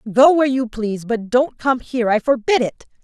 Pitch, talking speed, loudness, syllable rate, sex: 245 Hz, 215 wpm, -18 LUFS, 5.7 syllables/s, female